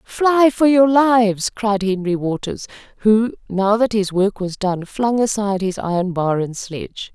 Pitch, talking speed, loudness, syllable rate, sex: 210 Hz, 175 wpm, -18 LUFS, 4.3 syllables/s, female